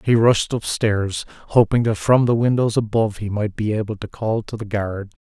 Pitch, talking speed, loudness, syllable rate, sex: 110 Hz, 205 wpm, -20 LUFS, 5.0 syllables/s, male